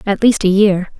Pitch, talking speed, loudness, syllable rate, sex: 200 Hz, 240 wpm, -13 LUFS, 4.8 syllables/s, female